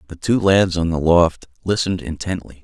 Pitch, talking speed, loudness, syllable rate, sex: 90 Hz, 180 wpm, -18 LUFS, 5.3 syllables/s, male